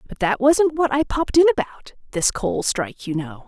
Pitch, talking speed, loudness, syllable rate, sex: 245 Hz, 225 wpm, -20 LUFS, 5.7 syllables/s, female